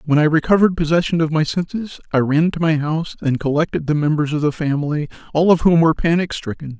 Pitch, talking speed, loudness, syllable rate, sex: 155 Hz, 220 wpm, -18 LUFS, 6.4 syllables/s, male